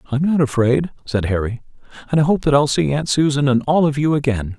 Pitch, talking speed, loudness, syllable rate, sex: 135 Hz, 235 wpm, -18 LUFS, 5.8 syllables/s, male